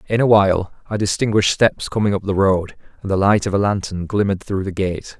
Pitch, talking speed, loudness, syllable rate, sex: 100 Hz, 230 wpm, -18 LUFS, 6.0 syllables/s, male